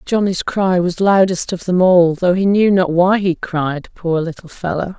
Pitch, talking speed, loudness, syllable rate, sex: 180 Hz, 205 wpm, -16 LUFS, 4.3 syllables/s, female